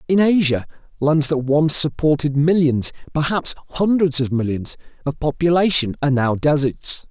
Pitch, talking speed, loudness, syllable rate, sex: 150 Hz, 135 wpm, -18 LUFS, 4.9 syllables/s, male